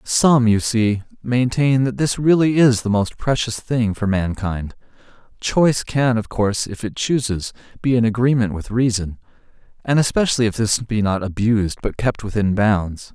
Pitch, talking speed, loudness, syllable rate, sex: 115 Hz, 170 wpm, -19 LUFS, 4.7 syllables/s, male